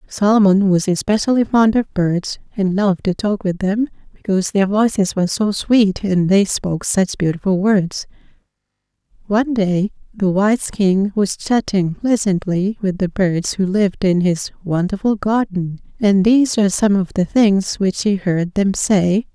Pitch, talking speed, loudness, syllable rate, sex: 195 Hz, 165 wpm, -17 LUFS, 4.5 syllables/s, female